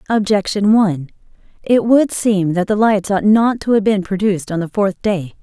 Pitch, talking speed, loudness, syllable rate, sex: 205 Hz, 200 wpm, -15 LUFS, 5.0 syllables/s, female